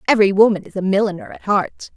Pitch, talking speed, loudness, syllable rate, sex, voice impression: 200 Hz, 215 wpm, -17 LUFS, 6.8 syllables/s, female, feminine, adult-like, tensed, powerful, slightly bright, raspy, slightly intellectual, slightly friendly, slightly unique, lively, slightly intense, sharp